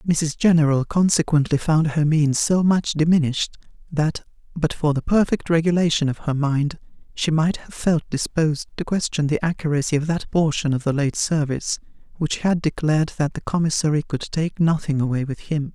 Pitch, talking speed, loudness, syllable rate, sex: 155 Hz, 175 wpm, -21 LUFS, 5.3 syllables/s, female